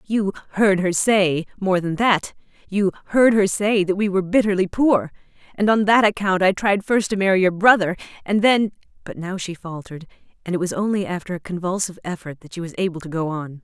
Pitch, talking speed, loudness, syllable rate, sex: 190 Hz, 205 wpm, -20 LUFS, 5.7 syllables/s, female